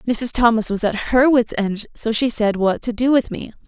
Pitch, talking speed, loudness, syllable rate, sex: 230 Hz, 245 wpm, -18 LUFS, 4.9 syllables/s, female